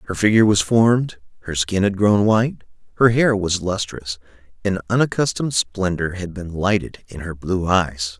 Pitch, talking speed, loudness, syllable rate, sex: 95 Hz, 170 wpm, -19 LUFS, 5.0 syllables/s, male